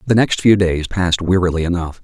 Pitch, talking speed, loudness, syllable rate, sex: 90 Hz, 205 wpm, -16 LUFS, 6.0 syllables/s, male